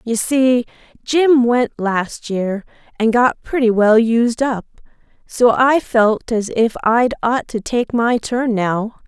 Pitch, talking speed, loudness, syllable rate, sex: 235 Hz, 160 wpm, -16 LUFS, 3.4 syllables/s, female